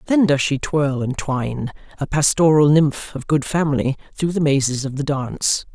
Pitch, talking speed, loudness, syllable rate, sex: 145 Hz, 190 wpm, -19 LUFS, 4.9 syllables/s, female